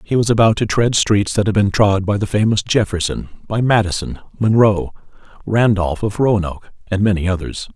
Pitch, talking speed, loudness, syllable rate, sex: 105 Hz, 180 wpm, -17 LUFS, 5.3 syllables/s, male